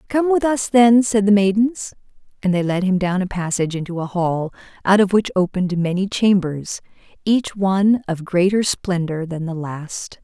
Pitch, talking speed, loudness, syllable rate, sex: 190 Hz, 180 wpm, -19 LUFS, 4.8 syllables/s, female